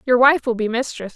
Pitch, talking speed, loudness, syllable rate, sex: 245 Hz, 260 wpm, -18 LUFS, 5.8 syllables/s, female